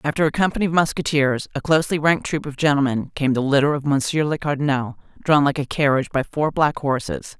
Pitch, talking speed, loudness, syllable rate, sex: 145 Hz, 210 wpm, -20 LUFS, 6.2 syllables/s, female